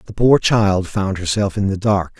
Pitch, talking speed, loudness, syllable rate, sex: 100 Hz, 220 wpm, -17 LUFS, 4.4 syllables/s, male